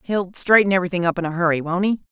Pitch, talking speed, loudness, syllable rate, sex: 180 Hz, 255 wpm, -19 LUFS, 7.2 syllables/s, female